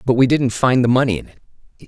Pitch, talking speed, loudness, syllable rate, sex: 125 Hz, 255 wpm, -16 LUFS, 6.7 syllables/s, male